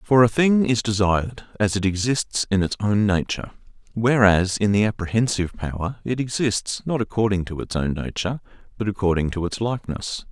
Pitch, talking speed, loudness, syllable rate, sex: 105 Hz, 175 wpm, -22 LUFS, 5.5 syllables/s, male